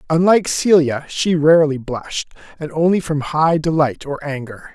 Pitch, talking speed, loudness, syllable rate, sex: 155 Hz, 150 wpm, -17 LUFS, 4.9 syllables/s, male